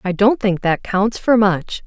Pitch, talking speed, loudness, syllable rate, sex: 200 Hz, 225 wpm, -17 LUFS, 4.0 syllables/s, female